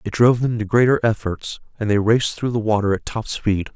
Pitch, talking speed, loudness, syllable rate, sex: 110 Hz, 240 wpm, -19 LUFS, 5.8 syllables/s, male